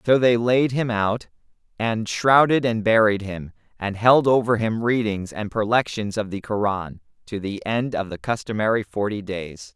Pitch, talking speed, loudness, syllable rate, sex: 110 Hz, 170 wpm, -21 LUFS, 4.5 syllables/s, male